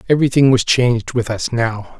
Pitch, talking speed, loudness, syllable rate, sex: 120 Hz, 180 wpm, -16 LUFS, 5.5 syllables/s, male